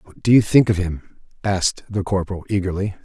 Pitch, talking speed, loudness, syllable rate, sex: 95 Hz, 195 wpm, -20 LUFS, 5.9 syllables/s, male